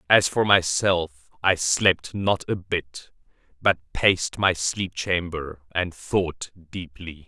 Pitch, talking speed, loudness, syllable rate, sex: 85 Hz, 130 wpm, -23 LUFS, 3.2 syllables/s, male